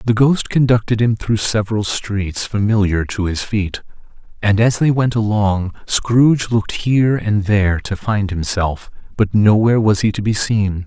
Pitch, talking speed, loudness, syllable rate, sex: 105 Hz, 170 wpm, -16 LUFS, 4.6 syllables/s, male